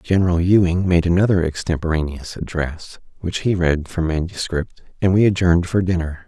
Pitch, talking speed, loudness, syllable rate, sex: 85 Hz, 155 wpm, -19 LUFS, 5.3 syllables/s, male